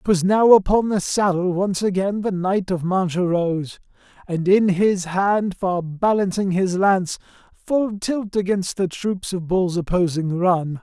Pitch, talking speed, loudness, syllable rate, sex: 190 Hz, 160 wpm, -20 LUFS, 3.9 syllables/s, male